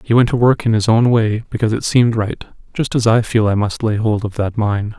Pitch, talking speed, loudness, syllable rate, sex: 110 Hz, 275 wpm, -16 LUFS, 5.7 syllables/s, male